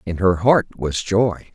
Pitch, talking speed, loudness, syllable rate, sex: 100 Hz, 195 wpm, -19 LUFS, 3.5 syllables/s, male